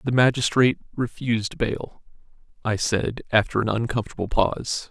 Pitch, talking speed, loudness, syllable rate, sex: 115 Hz, 120 wpm, -23 LUFS, 5.4 syllables/s, male